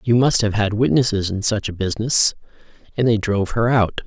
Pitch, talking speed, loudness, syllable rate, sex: 110 Hz, 205 wpm, -19 LUFS, 5.7 syllables/s, male